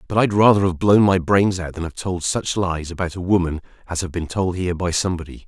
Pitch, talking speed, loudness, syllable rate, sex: 90 Hz, 250 wpm, -20 LUFS, 6.0 syllables/s, male